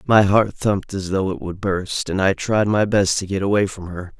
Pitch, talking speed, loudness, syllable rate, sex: 95 Hz, 260 wpm, -20 LUFS, 4.9 syllables/s, male